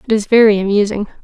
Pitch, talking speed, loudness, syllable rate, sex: 210 Hz, 195 wpm, -13 LUFS, 7.1 syllables/s, female